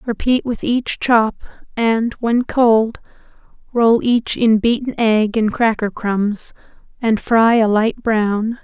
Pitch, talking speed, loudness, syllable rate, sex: 225 Hz, 140 wpm, -16 LUFS, 3.3 syllables/s, female